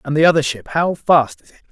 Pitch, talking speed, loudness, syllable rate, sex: 155 Hz, 245 wpm, -16 LUFS, 6.3 syllables/s, male